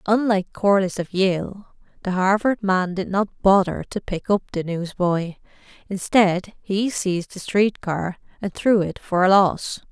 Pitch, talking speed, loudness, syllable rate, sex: 195 Hz, 165 wpm, -21 LUFS, 4.2 syllables/s, female